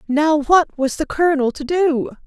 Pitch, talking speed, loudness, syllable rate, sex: 295 Hz, 185 wpm, -17 LUFS, 4.8 syllables/s, female